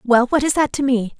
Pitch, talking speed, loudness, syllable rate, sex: 260 Hz, 300 wpm, -17 LUFS, 5.5 syllables/s, female